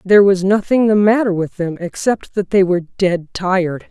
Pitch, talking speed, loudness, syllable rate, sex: 190 Hz, 200 wpm, -16 LUFS, 5.1 syllables/s, female